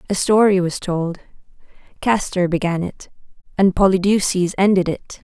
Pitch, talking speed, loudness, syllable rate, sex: 185 Hz, 125 wpm, -18 LUFS, 4.8 syllables/s, female